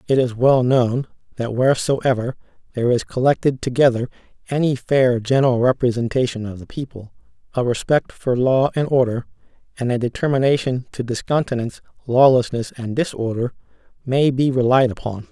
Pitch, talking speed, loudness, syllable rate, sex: 125 Hz, 135 wpm, -19 LUFS, 5.5 syllables/s, male